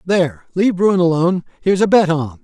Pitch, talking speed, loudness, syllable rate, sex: 175 Hz, 195 wpm, -16 LUFS, 6.3 syllables/s, male